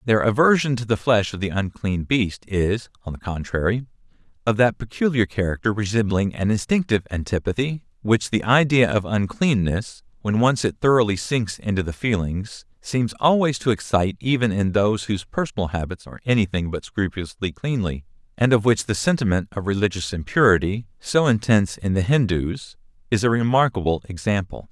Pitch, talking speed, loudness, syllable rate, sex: 105 Hz, 160 wpm, -21 LUFS, 5.4 syllables/s, male